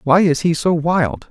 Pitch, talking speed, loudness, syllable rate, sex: 160 Hz, 230 wpm, -16 LUFS, 4.1 syllables/s, male